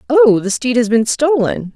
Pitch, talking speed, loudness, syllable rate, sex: 230 Hz, 205 wpm, -14 LUFS, 4.5 syllables/s, female